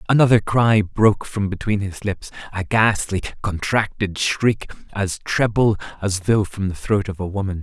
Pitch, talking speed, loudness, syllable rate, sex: 100 Hz, 165 wpm, -20 LUFS, 4.6 syllables/s, male